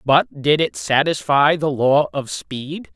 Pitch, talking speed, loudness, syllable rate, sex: 140 Hz, 165 wpm, -18 LUFS, 3.6 syllables/s, male